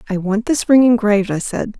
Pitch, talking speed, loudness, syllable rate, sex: 220 Hz, 235 wpm, -15 LUFS, 5.8 syllables/s, female